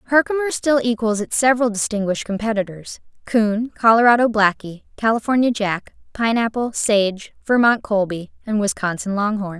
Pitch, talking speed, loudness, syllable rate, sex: 220 Hz, 120 wpm, -19 LUFS, 5.2 syllables/s, female